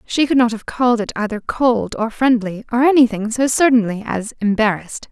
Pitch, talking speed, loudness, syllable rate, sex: 230 Hz, 190 wpm, -17 LUFS, 5.5 syllables/s, female